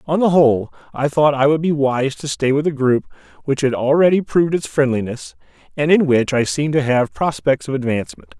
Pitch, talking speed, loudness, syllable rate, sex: 135 Hz, 215 wpm, -17 LUFS, 5.7 syllables/s, male